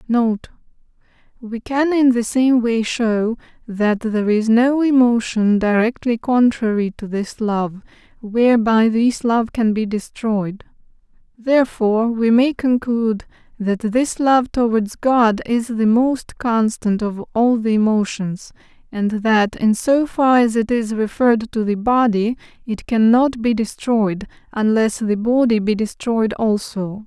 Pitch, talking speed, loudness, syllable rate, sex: 225 Hz, 135 wpm, -18 LUFS, 3.9 syllables/s, female